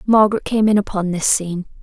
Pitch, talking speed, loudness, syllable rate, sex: 200 Hz, 195 wpm, -17 LUFS, 6.3 syllables/s, female